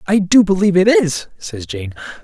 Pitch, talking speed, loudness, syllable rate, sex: 175 Hz, 190 wpm, -15 LUFS, 5.1 syllables/s, male